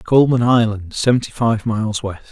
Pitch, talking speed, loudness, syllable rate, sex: 110 Hz, 155 wpm, -17 LUFS, 4.9 syllables/s, male